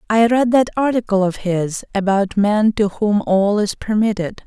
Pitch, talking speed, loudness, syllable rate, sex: 210 Hz, 175 wpm, -17 LUFS, 4.4 syllables/s, female